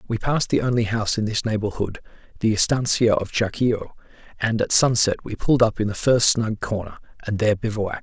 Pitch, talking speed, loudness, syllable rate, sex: 110 Hz, 195 wpm, -21 LUFS, 6.1 syllables/s, male